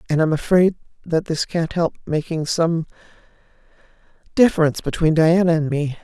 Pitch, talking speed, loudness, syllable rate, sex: 160 Hz, 140 wpm, -19 LUFS, 5.3 syllables/s, female